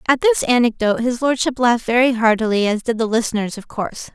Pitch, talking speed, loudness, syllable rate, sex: 235 Hz, 205 wpm, -18 LUFS, 6.3 syllables/s, female